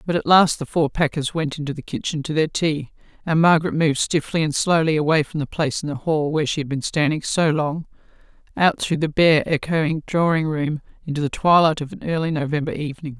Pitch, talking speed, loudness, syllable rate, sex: 155 Hz, 220 wpm, -20 LUFS, 5.9 syllables/s, female